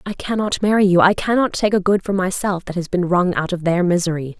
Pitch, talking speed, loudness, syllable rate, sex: 185 Hz, 260 wpm, -18 LUFS, 5.9 syllables/s, female